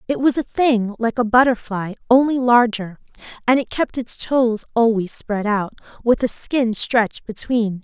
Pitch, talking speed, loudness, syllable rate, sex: 235 Hz, 170 wpm, -19 LUFS, 4.4 syllables/s, female